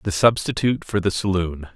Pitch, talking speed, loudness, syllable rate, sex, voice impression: 95 Hz, 170 wpm, -21 LUFS, 5.6 syllables/s, male, masculine, adult-like, thick, tensed, bright, soft, clear, cool, intellectual, calm, friendly, reassuring, wild, slightly lively, kind